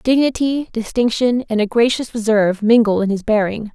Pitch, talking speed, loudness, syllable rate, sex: 225 Hz, 160 wpm, -17 LUFS, 5.2 syllables/s, female